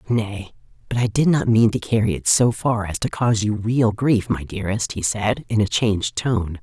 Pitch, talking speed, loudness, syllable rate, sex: 110 Hz, 225 wpm, -20 LUFS, 5.0 syllables/s, female